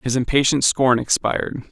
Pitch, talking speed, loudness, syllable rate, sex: 130 Hz, 140 wpm, -18 LUFS, 4.9 syllables/s, male